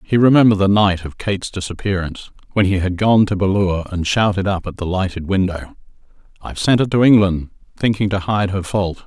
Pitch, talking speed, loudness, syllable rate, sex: 95 Hz, 200 wpm, -17 LUFS, 5.9 syllables/s, male